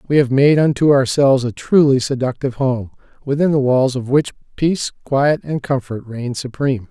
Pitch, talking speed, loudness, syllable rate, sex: 135 Hz, 175 wpm, -17 LUFS, 5.3 syllables/s, male